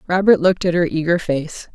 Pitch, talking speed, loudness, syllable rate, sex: 170 Hz, 205 wpm, -17 LUFS, 5.8 syllables/s, female